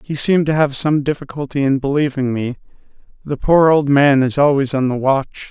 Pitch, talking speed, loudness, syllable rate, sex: 140 Hz, 195 wpm, -16 LUFS, 5.3 syllables/s, male